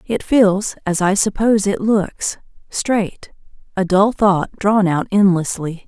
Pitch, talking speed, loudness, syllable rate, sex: 195 Hz, 135 wpm, -17 LUFS, 3.8 syllables/s, female